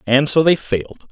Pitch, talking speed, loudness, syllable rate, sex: 140 Hz, 215 wpm, -16 LUFS, 5.3 syllables/s, male